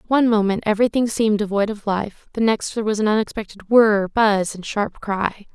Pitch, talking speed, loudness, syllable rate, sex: 210 Hz, 195 wpm, -20 LUFS, 5.6 syllables/s, female